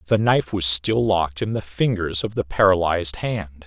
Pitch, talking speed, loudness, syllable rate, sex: 95 Hz, 195 wpm, -20 LUFS, 5.2 syllables/s, male